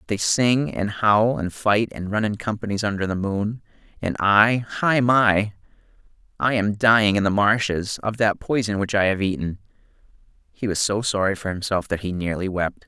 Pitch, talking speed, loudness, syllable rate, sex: 105 Hz, 175 wpm, -21 LUFS, 4.8 syllables/s, male